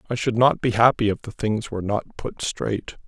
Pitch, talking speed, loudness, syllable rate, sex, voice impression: 110 Hz, 235 wpm, -22 LUFS, 5.3 syllables/s, male, very masculine, very adult-like, middle-aged, very thick, slightly relaxed, slightly weak, slightly dark, very hard, muffled, slightly fluent, very raspy, very cool, very intellectual, slightly refreshing, sincere, very calm, very mature, slightly wild, slightly sweet, slightly lively, kind, slightly modest